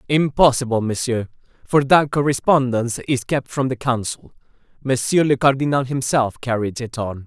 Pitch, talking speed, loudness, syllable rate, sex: 130 Hz, 140 wpm, -19 LUFS, 5.0 syllables/s, male